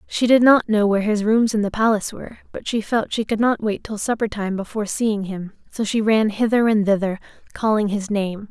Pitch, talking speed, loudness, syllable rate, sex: 215 Hz, 235 wpm, -20 LUFS, 5.6 syllables/s, female